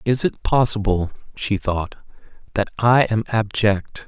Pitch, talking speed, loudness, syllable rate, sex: 105 Hz, 135 wpm, -20 LUFS, 4.0 syllables/s, male